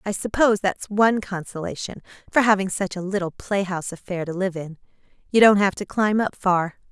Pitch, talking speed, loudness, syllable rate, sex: 195 Hz, 190 wpm, -22 LUFS, 5.7 syllables/s, female